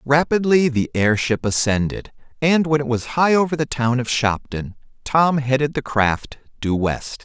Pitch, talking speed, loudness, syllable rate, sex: 130 Hz, 165 wpm, -19 LUFS, 4.4 syllables/s, male